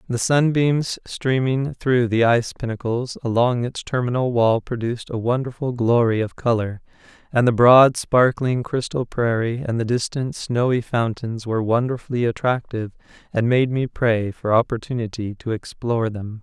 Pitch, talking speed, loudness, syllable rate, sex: 120 Hz, 145 wpm, -21 LUFS, 4.8 syllables/s, male